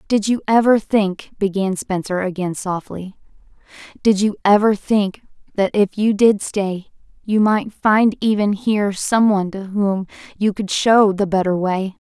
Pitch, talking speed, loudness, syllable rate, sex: 200 Hz, 155 wpm, -18 LUFS, 4.3 syllables/s, female